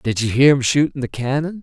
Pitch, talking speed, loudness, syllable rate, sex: 135 Hz, 260 wpm, -17 LUFS, 5.7 syllables/s, male